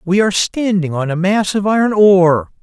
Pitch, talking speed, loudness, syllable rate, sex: 190 Hz, 205 wpm, -14 LUFS, 5.3 syllables/s, male